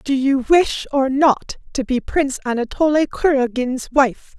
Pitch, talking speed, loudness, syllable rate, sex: 270 Hz, 150 wpm, -18 LUFS, 4.3 syllables/s, female